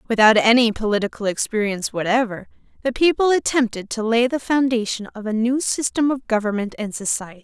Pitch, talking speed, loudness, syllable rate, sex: 230 Hz, 160 wpm, -20 LUFS, 5.8 syllables/s, female